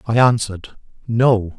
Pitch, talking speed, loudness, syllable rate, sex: 110 Hz, 115 wpm, -17 LUFS, 4.3 syllables/s, male